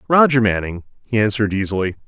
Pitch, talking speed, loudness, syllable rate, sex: 110 Hz, 145 wpm, -18 LUFS, 7.0 syllables/s, male